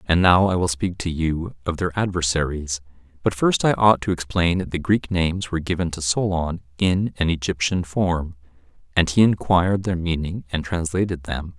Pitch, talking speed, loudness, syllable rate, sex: 85 Hz, 185 wpm, -22 LUFS, 5.1 syllables/s, male